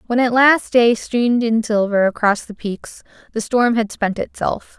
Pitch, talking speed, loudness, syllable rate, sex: 225 Hz, 190 wpm, -17 LUFS, 4.4 syllables/s, female